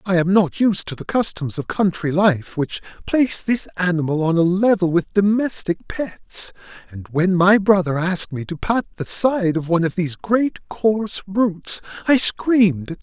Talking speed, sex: 200 wpm, male